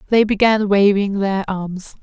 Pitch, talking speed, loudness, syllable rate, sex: 200 Hz, 150 wpm, -17 LUFS, 4.1 syllables/s, female